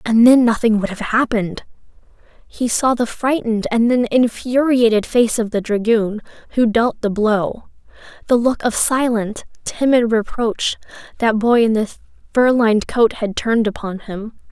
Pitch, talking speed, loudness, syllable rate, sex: 225 Hz, 155 wpm, -17 LUFS, 4.6 syllables/s, female